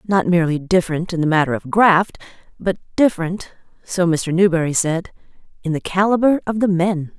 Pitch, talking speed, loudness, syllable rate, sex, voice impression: 180 Hz, 165 wpm, -18 LUFS, 5.5 syllables/s, female, very feminine, slightly young, very adult-like, thin, slightly tensed, slightly weak, very bright, soft, very clear, very fluent, cute, slightly cool, intellectual, very refreshing, slightly sincere, calm, very friendly, very reassuring, slightly unique, elegant, wild, very sweet, lively, kind, slightly intense, light